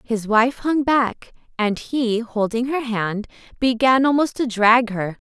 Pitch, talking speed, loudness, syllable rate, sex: 235 Hz, 160 wpm, -19 LUFS, 3.7 syllables/s, female